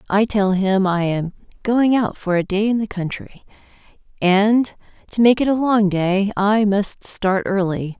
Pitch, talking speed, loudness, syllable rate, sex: 200 Hz, 180 wpm, -18 LUFS, 4.1 syllables/s, female